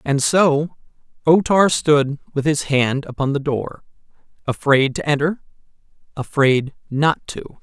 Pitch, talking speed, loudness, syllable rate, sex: 145 Hz, 125 wpm, -18 LUFS, 3.9 syllables/s, male